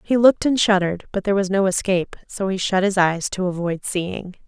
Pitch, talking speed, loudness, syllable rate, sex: 190 Hz, 230 wpm, -20 LUFS, 5.8 syllables/s, female